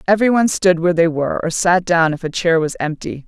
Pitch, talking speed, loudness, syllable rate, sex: 170 Hz, 255 wpm, -16 LUFS, 6.5 syllables/s, female